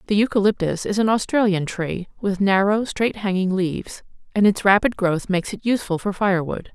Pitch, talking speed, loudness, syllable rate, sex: 200 Hz, 180 wpm, -21 LUFS, 5.6 syllables/s, female